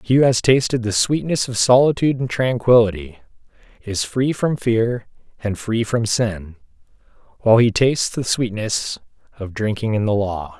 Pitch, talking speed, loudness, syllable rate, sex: 110 Hz, 160 wpm, -18 LUFS, 4.8 syllables/s, male